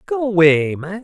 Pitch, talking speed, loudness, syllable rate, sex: 175 Hz, 175 wpm, -15 LUFS, 3.3 syllables/s, male